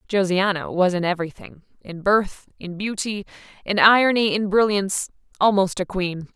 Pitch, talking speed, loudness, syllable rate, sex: 195 Hz, 125 wpm, -20 LUFS, 5.1 syllables/s, female